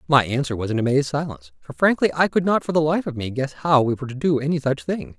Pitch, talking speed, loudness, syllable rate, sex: 140 Hz, 290 wpm, -21 LUFS, 6.6 syllables/s, male